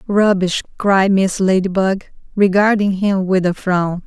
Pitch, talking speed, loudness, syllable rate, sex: 190 Hz, 135 wpm, -16 LUFS, 4.1 syllables/s, female